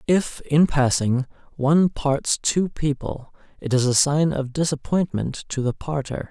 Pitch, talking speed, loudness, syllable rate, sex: 140 Hz, 150 wpm, -22 LUFS, 4.2 syllables/s, male